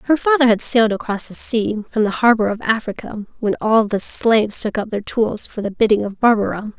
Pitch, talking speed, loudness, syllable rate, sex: 220 Hz, 220 wpm, -17 LUFS, 5.5 syllables/s, female